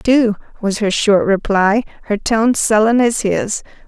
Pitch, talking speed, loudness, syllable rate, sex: 215 Hz, 155 wpm, -15 LUFS, 3.9 syllables/s, female